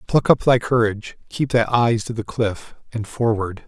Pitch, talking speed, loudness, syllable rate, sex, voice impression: 115 Hz, 195 wpm, -20 LUFS, 4.7 syllables/s, male, masculine, middle-aged, relaxed, soft, raspy, calm, friendly, reassuring, wild, kind, modest